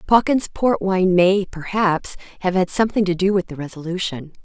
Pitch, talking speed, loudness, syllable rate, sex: 185 Hz, 175 wpm, -19 LUFS, 5.1 syllables/s, female